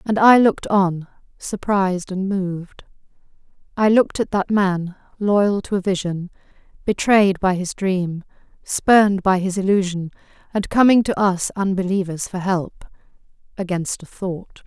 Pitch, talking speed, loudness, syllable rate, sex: 190 Hz, 135 wpm, -19 LUFS, 4.5 syllables/s, female